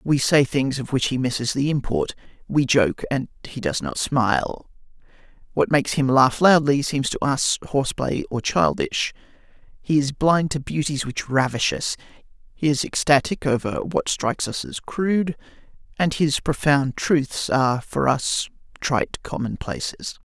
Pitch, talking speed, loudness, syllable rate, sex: 135 Hz, 155 wpm, -22 LUFS, 4.5 syllables/s, male